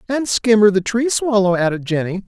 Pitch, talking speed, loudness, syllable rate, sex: 205 Hz, 185 wpm, -16 LUFS, 5.3 syllables/s, male